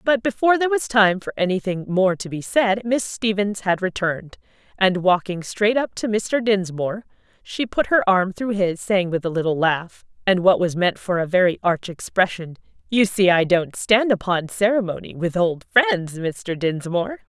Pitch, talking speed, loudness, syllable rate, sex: 195 Hz, 185 wpm, -20 LUFS, 4.8 syllables/s, female